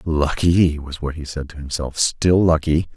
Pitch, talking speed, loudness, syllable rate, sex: 80 Hz, 180 wpm, -19 LUFS, 4.3 syllables/s, male